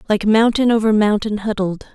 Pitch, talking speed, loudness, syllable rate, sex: 215 Hz, 155 wpm, -16 LUFS, 5.2 syllables/s, female